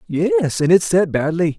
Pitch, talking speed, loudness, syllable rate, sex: 160 Hz, 190 wpm, -17 LUFS, 4.1 syllables/s, male